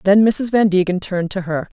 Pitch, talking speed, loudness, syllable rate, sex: 190 Hz, 235 wpm, -17 LUFS, 5.7 syllables/s, female